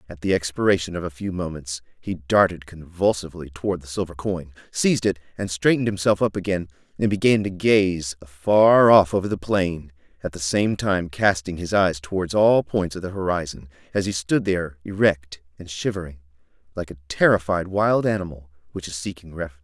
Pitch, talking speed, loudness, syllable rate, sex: 90 Hz, 180 wpm, -22 LUFS, 5.5 syllables/s, male